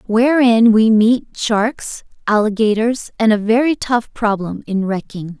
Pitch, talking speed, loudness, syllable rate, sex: 220 Hz, 135 wpm, -15 LUFS, 3.9 syllables/s, female